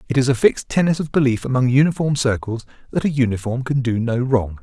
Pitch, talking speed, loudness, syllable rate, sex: 125 Hz, 220 wpm, -19 LUFS, 6.2 syllables/s, male